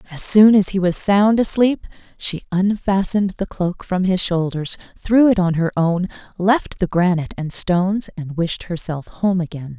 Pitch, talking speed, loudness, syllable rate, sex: 185 Hz, 180 wpm, -18 LUFS, 4.5 syllables/s, female